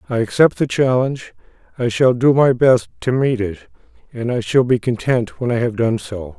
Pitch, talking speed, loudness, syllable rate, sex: 120 Hz, 205 wpm, -17 LUFS, 5.0 syllables/s, male